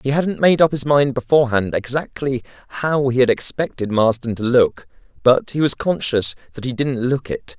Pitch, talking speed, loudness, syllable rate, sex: 130 Hz, 190 wpm, -18 LUFS, 5.0 syllables/s, male